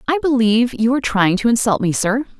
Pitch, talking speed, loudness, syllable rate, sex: 230 Hz, 225 wpm, -16 LUFS, 6.1 syllables/s, female